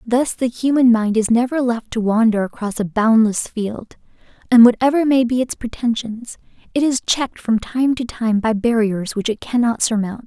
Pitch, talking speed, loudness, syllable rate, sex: 230 Hz, 185 wpm, -17 LUFS, 4.9 syllables/s, female